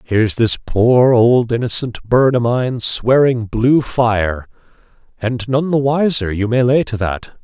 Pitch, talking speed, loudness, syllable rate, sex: 120 Hz, 160 wpm, -15 LUFS, 4.0 syllables/s, male